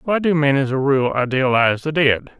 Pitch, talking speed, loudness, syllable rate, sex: 140 Hz, 225 wpm, -17 LUFS, 5.2 syllables/s, male